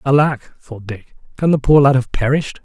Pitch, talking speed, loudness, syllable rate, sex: 135 Hz, 205 wpm, -15 LUFS, 5.3 syllables/s, male